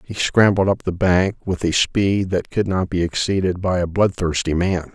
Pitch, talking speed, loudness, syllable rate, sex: 90 Hz, 205 wpm, -19 LUFS, 4.6 syllables/s, male